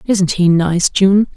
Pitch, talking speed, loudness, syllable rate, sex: 190 Hz, 175 wpm, -13 LUFS, 3.3 syllables/s, female